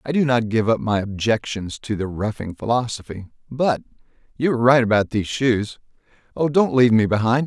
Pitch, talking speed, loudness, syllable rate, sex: 115 Hz, 185 wpm, -20 LUFS, 5.6 syllables/s, male